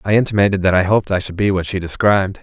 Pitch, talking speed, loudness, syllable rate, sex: 95 Hz, 270 wpm, -16 LUFS, 7.3 syllables/s, male